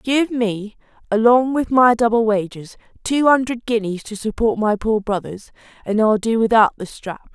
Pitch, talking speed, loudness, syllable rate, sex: 225 Hz, 170 wpm, -18 LUFS, 4.6 syllables/s, female